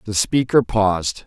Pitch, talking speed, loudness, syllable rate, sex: 105 Hz, 140 wpm, -18 LUFS, 4.4 syllables/s, male